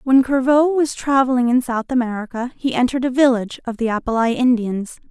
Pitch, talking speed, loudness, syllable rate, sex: 250 Hz, 175 wpm, -18 LUFS, 5.9 syllables/s, female